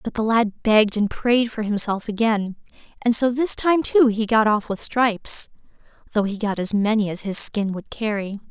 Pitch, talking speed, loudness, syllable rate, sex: 220 Hz, 205 wpm, -20 LUFS, 4.8 syllables/s, female